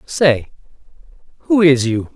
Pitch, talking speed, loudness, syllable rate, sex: 145 Hz, 110 wpm, -15 LUFS, 3.7 syllables/s, male